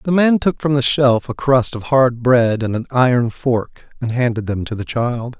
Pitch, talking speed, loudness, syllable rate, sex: 125 Hz, 235 wpm, -17 LUFS, 4.5 syllables/s, male